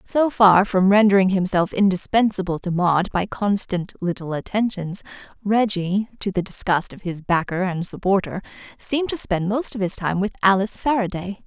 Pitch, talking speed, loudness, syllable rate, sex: 195 Hz, 160 wpm, -21 LUFS, 5.1 syllables/s, female